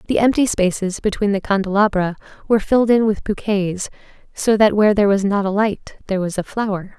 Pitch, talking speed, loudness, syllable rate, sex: 205 Hz, 195 wpm, -18 LUFS, 6.1 syllables/s, female